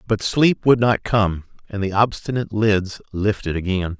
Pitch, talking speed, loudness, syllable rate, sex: 105 Hz, 165 wpm, -20 LUFS, 4.6 syllables/s, male